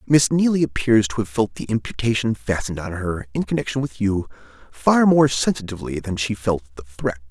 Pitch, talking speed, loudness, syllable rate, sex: 110 Hz, 190 wpm, -21 LUFS, 5.7 syllables/s, male